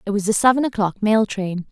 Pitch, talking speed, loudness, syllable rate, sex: 210 Hz, 245 wpm, -19 LUFS, 5.7 syllables/s, female